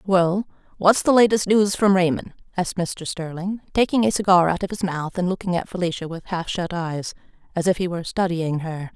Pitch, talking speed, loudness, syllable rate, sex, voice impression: 180 Hz, 210 wpm, -22 LUFS, 5.4 syllables/s, female, feminine, adult-like, slightly weak, slightly soft, clear, fluent, intellectual, calm, elegant, slightly strict, slightly sharp